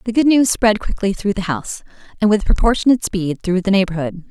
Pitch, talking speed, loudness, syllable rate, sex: 200 Hz, 210 wpm, -17 LUFS, 6.1 syllables/s, female